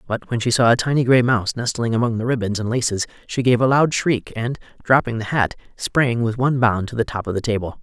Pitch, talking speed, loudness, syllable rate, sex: 120 Hz, 255 wpm, -20 LUFS, 6.0 syllables/s, male